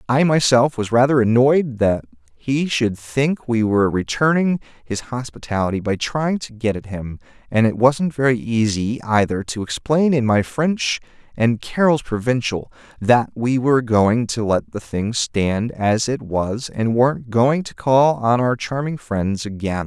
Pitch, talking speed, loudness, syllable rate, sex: 120 Hz, 170 wpm, -19 LUFS, 4.2 syllables/s, male